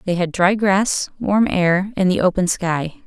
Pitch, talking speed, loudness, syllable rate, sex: 185 Hz, 195 wpm, -18 LUFS, 4.1 syllables/s, female